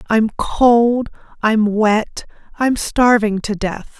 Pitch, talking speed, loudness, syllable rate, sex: 220 Hz, 120 wpm, -16 LUFS, 2.9 syllables/s, female